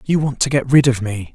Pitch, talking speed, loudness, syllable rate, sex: 130 Hz, 310 wpm, -17 LUFS, 5.6 syllables/s, male